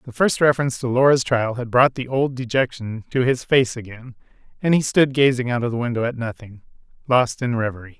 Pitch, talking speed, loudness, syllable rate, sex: 125 Hz, 210 wpm, -20 LUFS, 5.8 syllables/s, male